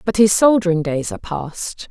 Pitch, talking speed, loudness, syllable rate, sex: 185 Hz, 190 wpm, -17 LUFS, 5.0 syllables/s, female